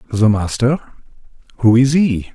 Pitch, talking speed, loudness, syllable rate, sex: 120 Hz, 100 wpm, -15 LUFS, 4.0 syllables/s, male